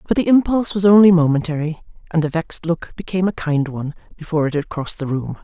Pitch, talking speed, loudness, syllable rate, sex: 165 Hz, 220 wpm, -18 LUFS, 6.9 syllables/s, female